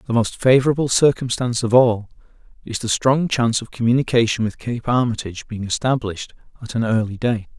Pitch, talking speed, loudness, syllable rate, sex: 120 Hz, 165 wpm, -19 LUFS, 6.1 syllables/s, male